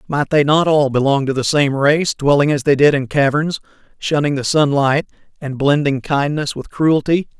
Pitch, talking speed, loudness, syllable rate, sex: 145 Hz, 185 wpm, -16 LUFS, 4.8 syllables/s, male